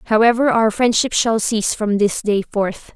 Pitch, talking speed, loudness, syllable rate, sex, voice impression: 220 Hz, 180 wpm, -17 LUFS, 4.5 syllables/s, female, very feminine, slightly young, slightly adult-like, very thin, tensed, powerful, bright, slightly soft, clear, very fluent, very cute, intellectual, very refreshing, sincere, slightly calm, very friendly, very reassuring, very unique, elegant, slightly wild, slightly sweet, very lively, slightly kind, slightly intense, slightly modest, light